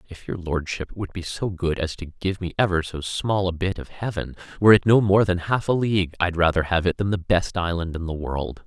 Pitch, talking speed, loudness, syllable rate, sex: 90 Hz, 255 wpm, -23 LUFS, 5.5 syllables/s, male